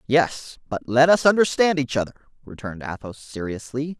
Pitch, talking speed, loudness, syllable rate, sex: 130 Hz, 150 wpm, -21 LUFS, 5.4 syllables/s, male